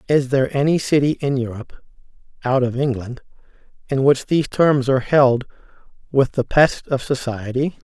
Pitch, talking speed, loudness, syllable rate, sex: 135 Hz, 150 wpm, -19 LUFS, 5.2 syllables/s, male